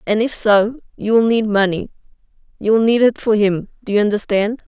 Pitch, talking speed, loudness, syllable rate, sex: 215 Hz, 175 wpm, -16 LUFS, 4.7 syllables/s, female